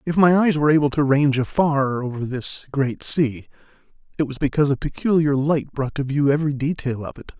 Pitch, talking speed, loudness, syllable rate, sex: 140 Hz, 205 wpm, -21 LUFS, 5.8 syllables/s, male